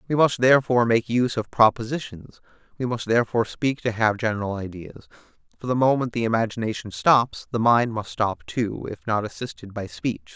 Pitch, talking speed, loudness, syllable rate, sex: 115 Hz, 180 wpm, -23 LUFS, 5.6 syllables/s, male